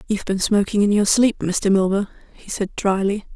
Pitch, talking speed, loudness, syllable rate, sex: 200 Hz, 195 wpm, -19 LUFS, 5.3 syllables/s, female